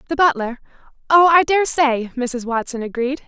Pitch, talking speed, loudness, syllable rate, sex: 275 Hz, 145 wpm, -17 LUFS, 4.7 syllables/s, female